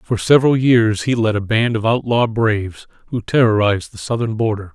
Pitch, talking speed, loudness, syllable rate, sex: 110 Hz, 190 wpm, -17 LUFS, 5.4 syllables/s, male